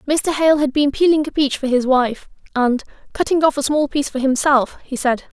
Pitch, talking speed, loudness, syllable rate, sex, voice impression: 280 Hz, 225 wpm, -18 LUFS, 5.1 syllables/s, female, feminine, slightly adult-like, clear, slightly fluent, friendly, lively